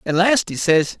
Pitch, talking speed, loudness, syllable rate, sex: 190 Hz, 240 wpm, -17 LUFS, 4.6 syllables/s, male